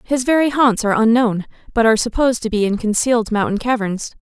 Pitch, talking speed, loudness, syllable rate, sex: 230 Hz, 200 wpm, -17 LUFS, 6.4 syllables/s, female